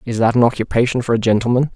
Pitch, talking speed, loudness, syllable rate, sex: 120 Hz, 240 wpm, -16 LUFS, 7.4 syllables/s, male